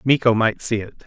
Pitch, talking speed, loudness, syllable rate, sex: 115 Hz, 225 wpm, -20 LUFS, 5.3 syllables/s, male